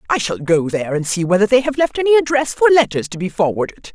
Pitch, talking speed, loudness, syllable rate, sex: 220 Hz, 260 wpm, -16 LUFS, 6.4 syllables/s, female